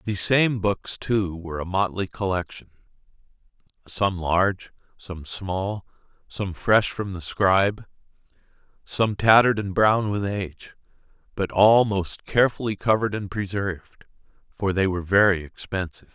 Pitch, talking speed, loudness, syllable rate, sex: 100 Hz, 125 wpm, -23 LUFS, 4.7 syllables/s, male